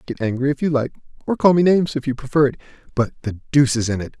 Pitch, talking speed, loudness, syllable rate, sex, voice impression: 135 Hz, 270 wpm, -19 LUFS, 7.2 syllables/s, male, masculine, middle-aged, powerful, bright, clear, mature, lively